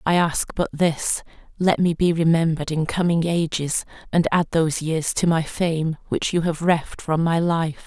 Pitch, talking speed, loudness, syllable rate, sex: 165 Hz, 190 wpm, -21 LUFS, 4.5 syllables/s, female